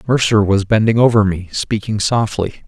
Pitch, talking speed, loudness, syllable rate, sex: 105 Hz, 155 wpm, -15 LUFS, 5.1 syllables/s, male